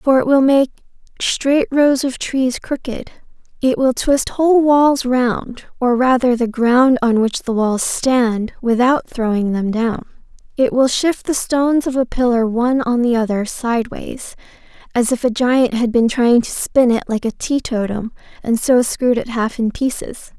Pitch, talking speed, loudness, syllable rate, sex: 245 Hz, 175 wpm, -16 LUFS, 4.3 syllables/s, female